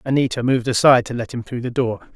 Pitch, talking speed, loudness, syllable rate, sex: 120 Hz, 250 wpm, -19 LUFS, 7.0 syllables/s, male